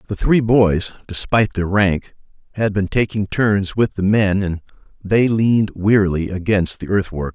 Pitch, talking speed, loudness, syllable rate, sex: 100 Hz, 165 wpm, -18 LUFS, 4.5 syllables/s, male